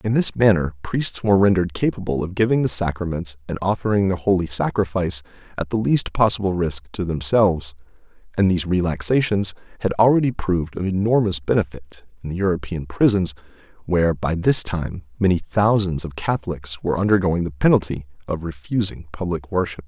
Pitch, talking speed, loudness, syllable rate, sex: 90 Hz, 155 wpm, -21 LUFS, 5.7 syllables/s, male